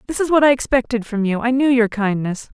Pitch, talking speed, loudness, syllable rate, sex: 240 Hz, 230 wpm, -18 LUFS, 6.0 syllables/s, female